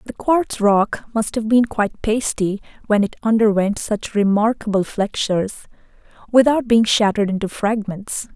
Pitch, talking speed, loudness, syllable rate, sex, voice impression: 215 Hz, 135 wpm, -18 LUFS, 4.7 syllables/s, female, very feminine, slightly young, very adult-like, very thin, relaxed, weak, slightly dark, soft, clear, very fluent, slightly raspy, very cute, very intellectual, refreshing, very sincere, very calm, very friendly, very reassuring, very unique, very elegant, slightly wild, very sweet, slightly lively, very kind, slightly sharp, modest, light